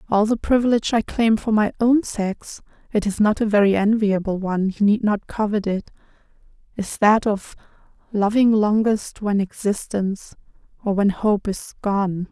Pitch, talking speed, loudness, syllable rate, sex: 210 Hz, 160 wpm, -20 LUFS, 3.3 syllables/s, female